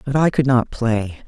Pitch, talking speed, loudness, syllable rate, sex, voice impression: 125 Hz, 235 wpm, -18 LUFS, 4.6 syllables/s, female, feminine, adult-like, tensed, powerful, soft, clear, fluent, intellectual, friendly, reassuring, elegant, lively, kind